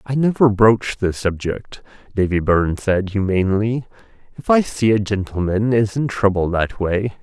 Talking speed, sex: 160 wpm, male